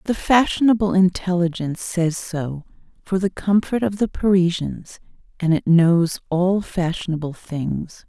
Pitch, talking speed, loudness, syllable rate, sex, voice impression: 180 Hz, 125 wpm, -20 LUFS, 4.3 syllables/s, female, very feminine, middle-aged, slightly relaxed, slightly weak, slightly bright, slightly soft, clear, fluent, slightly cute, intellectual, refreshing, sincere, calm, friendly, reassuring, unique, slightly elegant, wild, sweet, slightly lively, kind, slightly modest